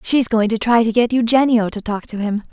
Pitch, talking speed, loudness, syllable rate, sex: 225 Hz, 260 wpm, -17 LUFS, 5.5 syllables/s, female